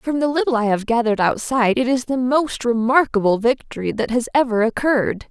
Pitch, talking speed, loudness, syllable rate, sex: 245 Hz, 190 wpm, -19 LUFS, 5.7 syllables/s, female